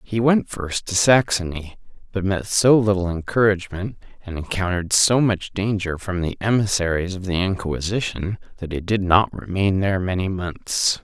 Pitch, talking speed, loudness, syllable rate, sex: 95 Hz, 160 wpm, -21 LUFS, 4.8 syllables/s, male